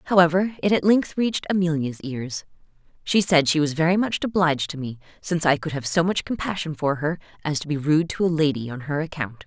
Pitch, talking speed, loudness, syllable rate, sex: 160 Hz, 220 wpm, -23 LUFS, 6.0 syllables/s, female